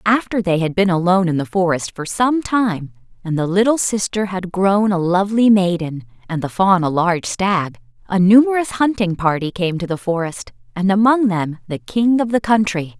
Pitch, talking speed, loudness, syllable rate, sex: 190 Hz, 195 wpm, -17 LUFS, 5.0 syllables/s, female